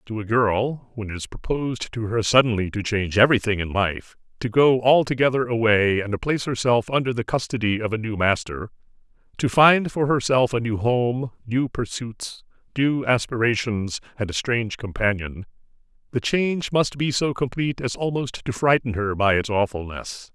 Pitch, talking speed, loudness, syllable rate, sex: 115 Hz, 170 wpm, -22 LUFS, 5.0 syllables/s, male